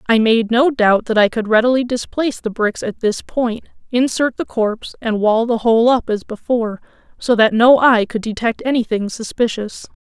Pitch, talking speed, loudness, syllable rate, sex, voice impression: 230 Hz, 190 wpm, -16 LUFS, 5.1 syllables/s, female, slightly feminine, slightly adult-like, slightly soft, slightly muffled, friendly, reassuring